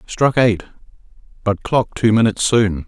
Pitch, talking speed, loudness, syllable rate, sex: 110 Hz, 145 wpm, -17 LUFS, 4.7 syllables/s, male